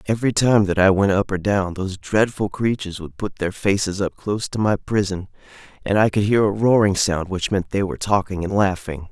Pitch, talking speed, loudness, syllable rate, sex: 100 Hz, 225 wpm, -20 LUFS, 5.6 syllables/s, male